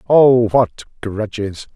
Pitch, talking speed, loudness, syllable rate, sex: 115 Hz, 105 wpm, -16 LUFS, 3.0 syllables/s, male